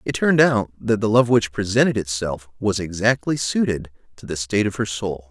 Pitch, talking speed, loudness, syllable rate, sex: 105 Hz, 205 wpm, -20 LUFS, 5.4 syllables/s, male